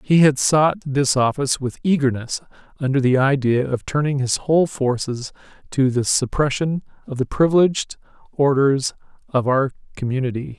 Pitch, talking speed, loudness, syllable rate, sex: 135 Hz, 140 wpm, -20 LUFS, 5.1 syllables/s, male